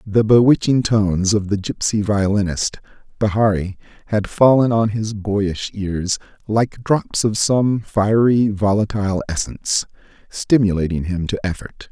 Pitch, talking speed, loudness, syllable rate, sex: 105 Hz, 125 wpm, -18 LUFS, 4.3 syllables/s, male